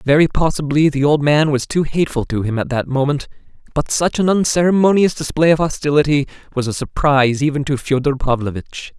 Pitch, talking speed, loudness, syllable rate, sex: 145 Hz, 180 wpm, -17 LUFS, 5.8 syllables/s, male